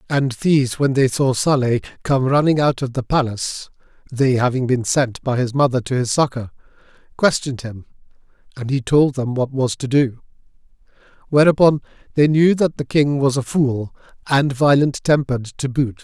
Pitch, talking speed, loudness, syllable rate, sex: 135 Hz, 170 wpm, -18 LUFS, 4.2 syllables/s, male